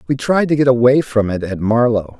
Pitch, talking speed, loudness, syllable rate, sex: 120 Hz, 245 wpm, -15 LUFS, 5.4 syllables/s, male